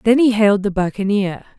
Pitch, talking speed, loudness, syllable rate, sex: 205 Hz, 190 wpm, -17 LUFS, 5.9 syllables/s, female